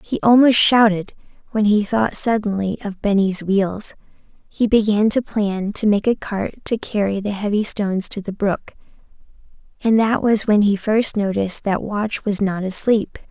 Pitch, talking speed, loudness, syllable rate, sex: 210 Hz, 170 wpm, -18 LUFS, 4.6 syllables/s, female